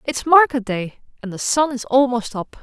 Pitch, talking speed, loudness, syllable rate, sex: 245 Hz, 205 wpm, -18 LUFS, 4.8 syllables/s, female